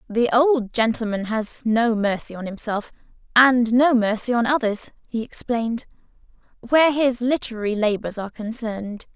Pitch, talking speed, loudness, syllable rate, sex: 230 Hz, 140 wpm, -21 LUFS, 5.0 syllables/s, female